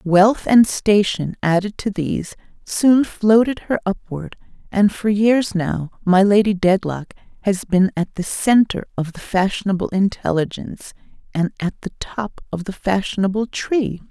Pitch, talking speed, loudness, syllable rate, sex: 200 Hz, 145 wpm, -18 LUFS, 4.3 syllables/s, female